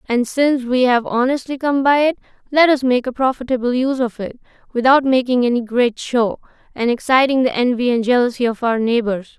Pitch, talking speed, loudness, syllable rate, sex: 250 Hz, 190 wpm, -17 LUFS, 5.6 syllables/s, female